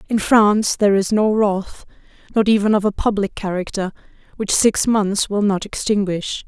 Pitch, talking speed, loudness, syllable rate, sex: 205 Hz, 165 wpm, -18 LUFS, 4.9 syllables/s, female